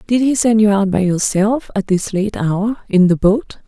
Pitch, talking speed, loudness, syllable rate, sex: 205 Hz, 230 wpm, -15 LUFS, 4.6 syllables/s, female